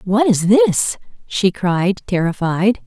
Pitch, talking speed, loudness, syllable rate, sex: 200 Hz, 125 wpm, -16 LUFS, 3.3 syllables/s, female